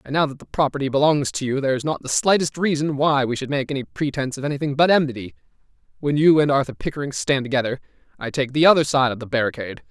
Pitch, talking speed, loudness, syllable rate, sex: 140 Hz, 235 wpm, -20 LUFS, 7.0 syllables/s, male